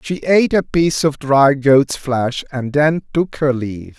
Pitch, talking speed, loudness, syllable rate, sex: 145 Hz, 195 wpm, -16 LUFS, 4.2 syllables/s, male